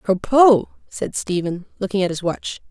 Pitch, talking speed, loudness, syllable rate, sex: 200 Hz, 155 wpm, -19 LUFS, 4.8 syllables/s, female